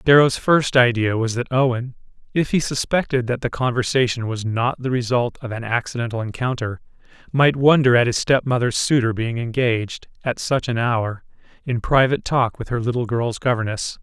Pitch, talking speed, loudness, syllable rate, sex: 120 Hz, 175 wpm, -20 LUFS, 5.2 syllables/s, male